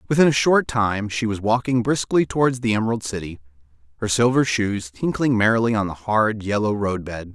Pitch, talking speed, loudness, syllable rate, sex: 110 Hz, 190 wpm, -21 LUFS, 5.4 syllables/s, male